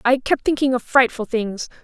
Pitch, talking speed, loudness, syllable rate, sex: 250 Hz, 195 wpm, -19 LUFS, 5.0 syllables/s, female